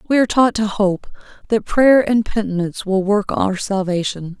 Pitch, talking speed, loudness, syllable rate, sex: 205 Hz, 175 wpm, -17 LUFS, 5.0 syllables/s, female